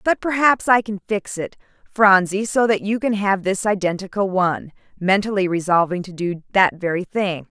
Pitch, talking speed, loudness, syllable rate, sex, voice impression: 195 Hz, 175 wpm, -19 LUFS, 4.9 syllables/s, female, feminine, middle-aged, tensed, bright, clear, slightly raspy, intellectual, friendly, reassuring, elegant, lively, slightly kind